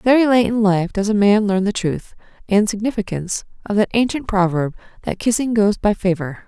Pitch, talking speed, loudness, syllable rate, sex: 205 Hz, 195 wpm, -18 LUFS, 4.8 syllables/s, female